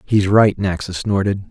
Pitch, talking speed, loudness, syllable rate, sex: 95 Hz, 160 wpm, -17 LUFS, 4.4 syllables/s, male